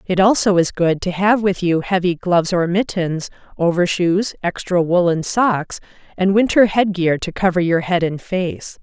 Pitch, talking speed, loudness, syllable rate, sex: 180 Hz, 170 wpm, -17 LUFS, 4.5 syllables/s, female